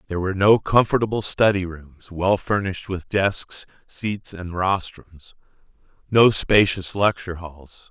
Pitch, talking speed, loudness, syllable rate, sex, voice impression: 95 Hz, 130 wpm, -21 LUFS, 4.3 syllables/s, male, masculine, adult-like, thick, tensed, powerful, slightly dark, clear, slightly nasal, cool, calm, slightly mature, reassuring, wild, lively, slightly strict